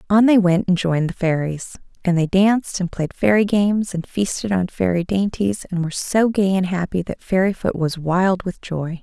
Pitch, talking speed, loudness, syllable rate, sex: 185 Hz, 205 wpm, -19 LUFS, 5.1 syllables/s, female